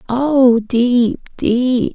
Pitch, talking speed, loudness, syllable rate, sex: 245 Hz, 95 wpm, -15 LUFS, 1.9 syllables/s, female